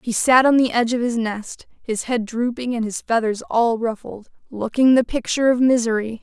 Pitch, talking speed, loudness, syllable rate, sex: 235 Hz, 200 wpm, -19 LUFS, 5.2 syllables/s, female